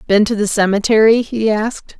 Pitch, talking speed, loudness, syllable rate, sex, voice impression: 215 Hz, 180 wpm, -14 LUFS, 5.5 syllables/s, female, feminine, adult-like, tensed, powerful, clear, fluent, calm, elegant, lively, strict, slightly intense, sharp